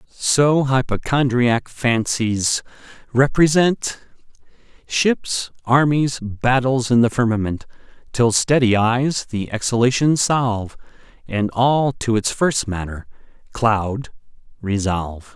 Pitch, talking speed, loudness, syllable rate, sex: 120 Hz, 95 wpm, -19 LUFS, 3.5 syllables/s, male